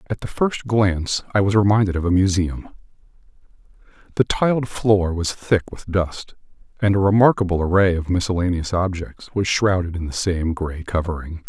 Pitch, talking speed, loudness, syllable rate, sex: 95 Hz, 160 wpm, -20 LUFS, 5.1 syllables/s, male